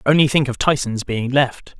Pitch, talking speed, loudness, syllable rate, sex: 130 Hz, 200 wpm, -18 LUFS, 4.9 syllables/s, male